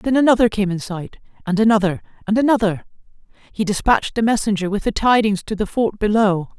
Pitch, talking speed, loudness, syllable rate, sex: 210 Hz, 180 wpm, -18 LUFS, 6.1 syllables/s, female